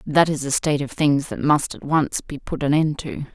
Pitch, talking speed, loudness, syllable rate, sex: 145 Hz, 270 wpm, -21 LUFS, 5.1 syllables/s, female